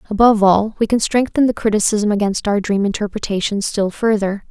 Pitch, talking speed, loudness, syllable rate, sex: 210 Hz, 175 wpm, -17 LUFS, 5.7 syllables/s, female